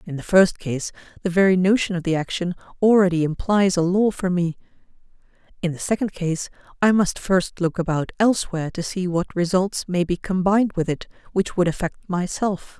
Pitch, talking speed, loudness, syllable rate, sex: 180 Hz, 185 wpm, -21 LUFS, 5.3 syllables/s, female